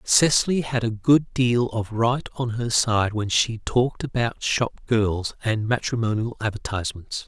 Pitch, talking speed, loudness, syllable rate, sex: 115 Hz, 155 wpm, -23 LUFS, 4.2 syllables/s, male